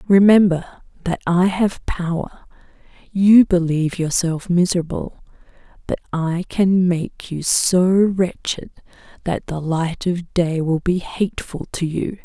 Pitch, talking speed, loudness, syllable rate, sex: 175 Hz, 125 wpm, -19 LUFS, 4.0 syllables/s, female